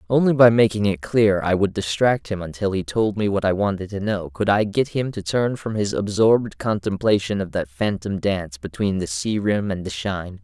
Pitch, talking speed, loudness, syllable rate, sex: 100 Hz, 225 wpm, -21 LUFS, 5.2 syllables/s, male